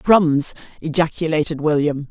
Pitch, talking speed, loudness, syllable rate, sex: 155 Hz, 85 wpm, -19 LUFS, 4.4 syllables/s, female